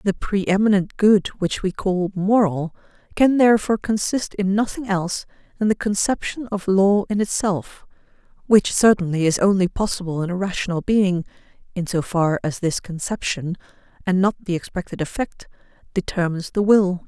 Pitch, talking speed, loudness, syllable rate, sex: 190 Hz, 150 wpm, -20 LUFS, 5.1 syllables/s, female